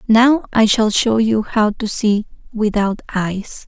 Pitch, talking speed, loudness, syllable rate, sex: 220 Hz, 165 wpm, -16 LUFS, 3.6 syllables/s, female